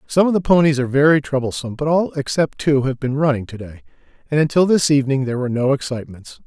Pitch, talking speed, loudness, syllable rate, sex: 140 Hz, 225 wpm, -18 LUFS, 7.0 syllables/s, male